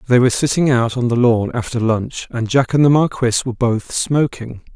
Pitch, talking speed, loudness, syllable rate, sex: 125 Hz, 215 wpm, -16 LUFS, 5.5 syllables/s, male